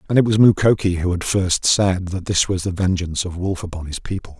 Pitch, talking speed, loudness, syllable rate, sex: 95 Hz, 245 wpm, -19 LUFS, 5.7 syllables/s, male